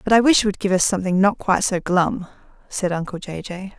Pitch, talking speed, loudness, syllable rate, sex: 190 Hz, 255 wpm, -20 LUFS, 6.1 syllables/s, female